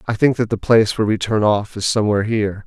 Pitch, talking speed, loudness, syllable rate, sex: 110 Hz, 270 wpm, -17 LUFS, 7.1 syllables/s, male